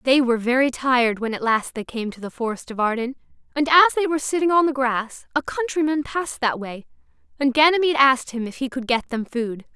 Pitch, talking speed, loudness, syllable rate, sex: 260 Hz, 230 wpm, -21 LUFS, 6.2 syllables/s, female